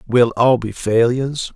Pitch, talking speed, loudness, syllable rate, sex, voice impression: 120 Hz, 155 wpm, -17 LUFS, 4.3 syllables/s, male, very masculine, old, very thick, tensed, very powerful, slightly bright, slightly soft, muffled, slightly fluent, raspy, cool, intellectual, slightly refreshing, sincere, calm, very mature, friendly, reassuring, very unique, slightly elegant, wild, sweet, lively, kind, modest